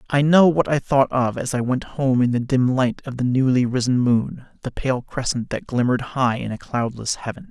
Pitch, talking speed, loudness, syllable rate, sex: 130 Hz, 230 wpm, -20 LUFS, 5.1 syllables/s, male